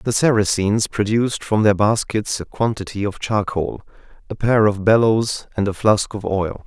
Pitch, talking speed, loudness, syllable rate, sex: 105 Hz, 170 wpm, -19 LUFS, 4.6 syllables/s, male